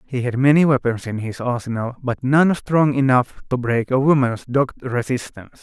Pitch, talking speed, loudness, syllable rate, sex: 130 Hz, 180 wpm, -19 LUFS, 5.1 syllables/s, male